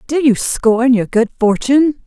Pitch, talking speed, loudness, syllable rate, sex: 250 Hz, 175 wpm, -14 LUFS, 4.5 syllables/s, female